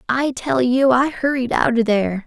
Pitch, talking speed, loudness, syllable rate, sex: 250 Hz, 210 wpm, -18 LUFS, 4.8 syllables/s, female